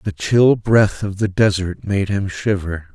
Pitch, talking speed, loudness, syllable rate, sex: 100 Hz, 185 wpm, -18 LUFS, 4.0 syllables/s, male